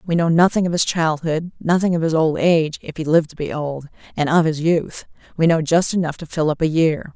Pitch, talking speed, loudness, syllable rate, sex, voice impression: 160 Hz, 250 wpm, -19 LUFS, 5.6 syllables/s, female, feminine, middle-aged, tensed, powerful, hard, clear, fluent, intellectual, elegant, lively, strict, sharp